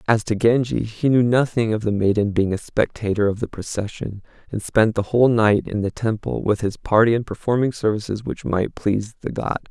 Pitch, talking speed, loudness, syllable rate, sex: 110 Hz, 210 wpm, -21 LUFS, 5.4 syllables/s, male